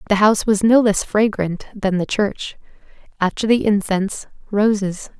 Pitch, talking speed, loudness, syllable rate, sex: 205 Hz, 150 wpm, -18 LUFS, 4.7 syllables/s, female